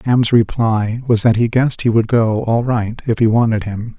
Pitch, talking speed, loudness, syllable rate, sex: 115 Hz, 225 wpm, -15 LUFS, 4.8 syllables/s, male